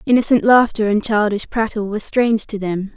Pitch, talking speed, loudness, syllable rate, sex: 215 Hz, 180 wpm, -17 LUFS, 5.7 syllables/s, female